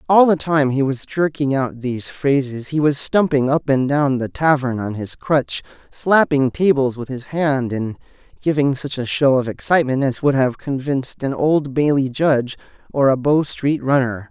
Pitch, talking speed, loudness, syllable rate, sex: 140 Hz, 190 wpm, -18 LUFS, 4.7 syllables/s, male